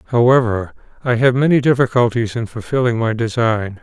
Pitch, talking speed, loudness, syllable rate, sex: 120 Hz, 140 wpm, -16 LUFS, 5.2 syllables/s, male